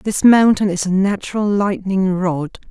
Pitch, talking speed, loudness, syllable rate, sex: 195 Hz, 155 wpm, -16 LUFS, 4.3 syllables/s, female